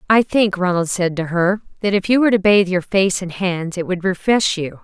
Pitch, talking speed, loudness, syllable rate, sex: 190 Hz, 250 wpm, -17 LUFS, 5.2 syllables/s, female